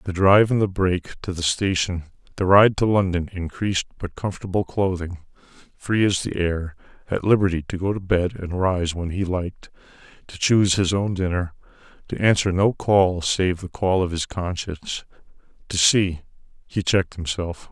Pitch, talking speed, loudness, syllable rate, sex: 90 Hz, 175 wpm, -22 LUFS, 5.1 syllables/s, male